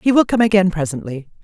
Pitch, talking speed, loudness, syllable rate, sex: 185 Hz, 210 wpm, -16 LUFS, 6.3 syllables/s, female